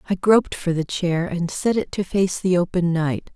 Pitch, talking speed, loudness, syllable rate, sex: 180 Hz, 235 wpm, -21 LUFS, 4.8 syllables/s, female